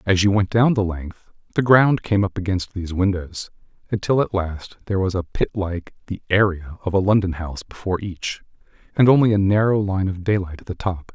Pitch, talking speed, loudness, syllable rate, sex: 95 Hz, 210 wpm, -21 LUFS, 5.5 syllables/s, male